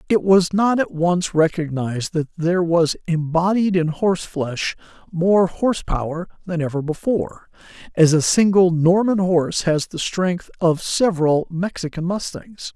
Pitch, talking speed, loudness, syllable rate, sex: 175 Hz, 145 wpm, -19 LUFS, 4.5 syllables/s, male